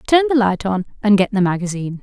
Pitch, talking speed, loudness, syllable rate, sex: 210 Hz, 235 wpm, -17 LUFS, 6.7 syllables/s, female